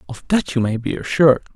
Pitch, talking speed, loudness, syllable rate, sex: 130 Hz, 230 wpm, -18 LUFS, 6.3 syllables/s, male